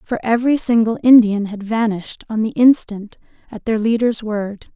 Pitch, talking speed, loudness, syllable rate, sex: 220 Hz, 165 wpm, -16 LUFS, 5.1 syllables/s, female